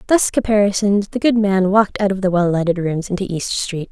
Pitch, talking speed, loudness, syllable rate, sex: 195 Hz, 230 wpm, -17 LUFS, 5.9 syllables/s, female